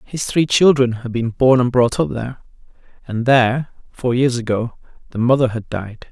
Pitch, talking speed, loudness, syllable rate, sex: 125 Hz, 185 wpm, -17 LUFS, 5.0 syllables/s, male